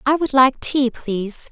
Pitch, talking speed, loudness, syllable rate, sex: 255 Hz, 200 wpm, -18 LUFS, 4.3 syllables/s, female